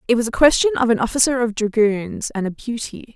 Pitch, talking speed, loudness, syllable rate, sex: 235 Hz, 230 wpm, -18 LUFS, 5.8 syllables/s, female